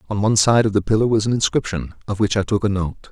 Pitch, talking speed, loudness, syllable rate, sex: 105 Hz, 290 wpm, -19 LUFS, 6.8 syllables/s, male